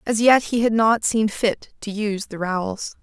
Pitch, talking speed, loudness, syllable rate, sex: 215 Hz, 220 wpm, -20 LUFS, 4.6 syllables/s, female